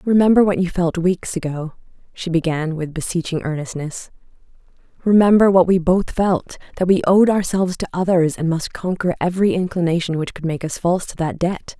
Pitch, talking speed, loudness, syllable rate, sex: 175 Hz, 175 wpm, -18 LUFS, 5.5 syllables/s, female